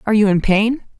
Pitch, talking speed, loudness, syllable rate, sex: 215 Hz, 240 wpm, -16 LUFS, 6.4 syllables/s, female